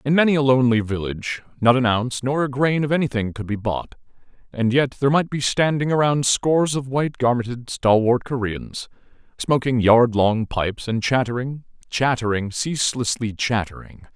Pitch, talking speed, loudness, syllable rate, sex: 125 Hz, 155 wpm, -20 LUFS, 5.3 syllables/s, male